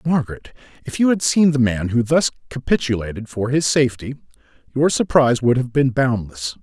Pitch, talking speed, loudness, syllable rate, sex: 125 Hz, 170 wpm, -18 LUFS, 5.6 syllables/s, male